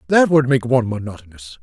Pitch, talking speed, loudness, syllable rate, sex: 120 Hz, 185 wpm, -17 LUFS, 6.4 syllables/s, male